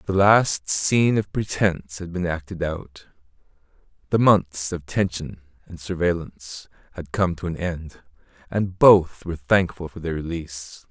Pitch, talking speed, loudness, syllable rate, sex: 85 Hz, 150 wpm, -22 LUFS, 4.4 syllables/s, male